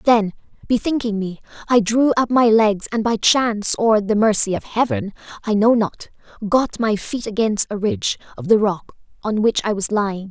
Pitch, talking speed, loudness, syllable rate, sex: 215 Hz, 190 wpm, -18 LUFS, 4.9 syllables/s, female